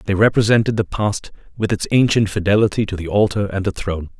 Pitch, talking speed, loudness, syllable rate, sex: 105 Hz, 200 wpm, -18 LUFS, 6.1 syllables/s, male